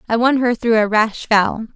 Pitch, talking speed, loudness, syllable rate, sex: 225 Hz, 240 wpm, -16 LUFS, 5.0 syllables/s, female